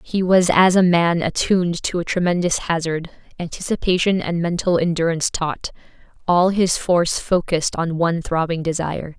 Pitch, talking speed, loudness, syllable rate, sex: 170 Hz, 150 wpm, -19 LUFS, 5.2 syllables/s, female